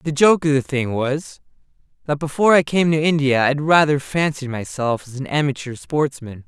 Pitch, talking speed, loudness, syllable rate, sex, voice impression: 140 Hz, 195 wpm, -19 LUFS, 5.2 syllables/s, male, masculine, adult-like, slightly weak, slightly bright, clear, fluent, calm, friendly, reassuring, lively, kind, slightly modest, light